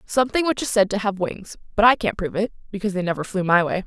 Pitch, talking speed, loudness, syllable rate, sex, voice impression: 205 Hz, 280 wpm, -21 LUFS, 7.0 syllables/s, female, very feminine, adult-like, fluent, slightly intellectual, slightly strict